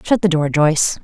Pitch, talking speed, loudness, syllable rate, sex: 165 Hz, 235 wpm, -16 LUFS, 5.4 syllables/s, female